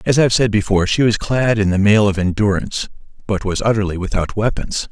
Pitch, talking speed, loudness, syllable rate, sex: 105 Hz, 220 wpm, -17 LUFS, 6.1 syllables/s, male